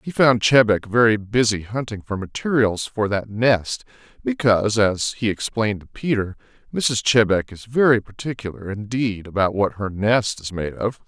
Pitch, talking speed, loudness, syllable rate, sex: 110 Hz, 165 wpm, -20 LUFS, 4.8 syllables/s, male